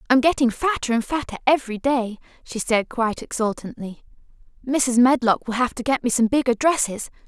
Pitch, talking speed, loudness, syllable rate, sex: 245 Hz, 175 wpm, -21 LUFS, 5.6 syllables/s, female